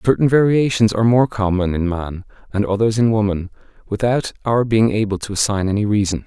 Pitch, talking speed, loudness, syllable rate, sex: 105 Hz, 180 wpm, -17 LUFS, 5.7 syllables/s, male